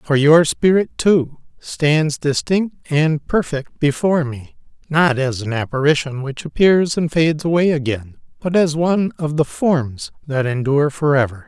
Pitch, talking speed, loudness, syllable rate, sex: 150 Hz, 150 wpm, -17 LUFS, 4.5 syllables/s, male